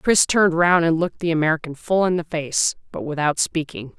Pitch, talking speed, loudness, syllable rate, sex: 165 Hz, 210 wpm, -20 LUFS, 5.5 syllables/s, female